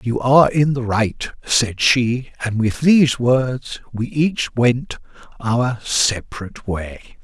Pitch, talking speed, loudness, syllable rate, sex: 125 Hz, 140 wpm, -18 LUFS, 3.5 syllables/s, male